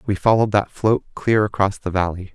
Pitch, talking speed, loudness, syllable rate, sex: 100 Hz, 205 wpm, -19 LUFS, 5.7 syllables/s, male